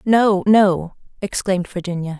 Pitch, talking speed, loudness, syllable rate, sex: 190 Hz, 110 wpm, -18 LUFS, 4.4 syllables/s, female